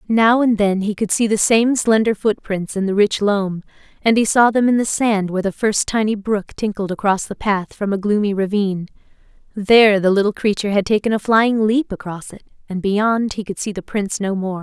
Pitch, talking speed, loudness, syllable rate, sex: 205 Hz, 225 wpm, -17 LUFS, 5.3 syllables/s, female